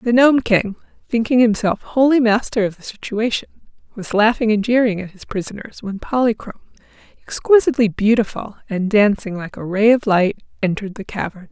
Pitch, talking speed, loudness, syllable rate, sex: 220 Hz, 160 wpm, -18 LUFS, 5.5 syllables/s, female